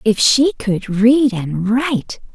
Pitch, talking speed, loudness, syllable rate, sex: 230 Hz, 155 wpm, -15 LUFS, 3.5 syllables/s, female